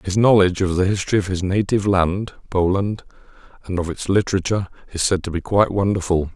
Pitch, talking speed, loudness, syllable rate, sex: 95 Hz, 190 wpm, -20 LUFS, 6.5 syllables/s, male